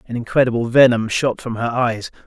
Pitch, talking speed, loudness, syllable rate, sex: 120 Hz, 185 wpm, -17 LUFS, 5.6 syllables/s, male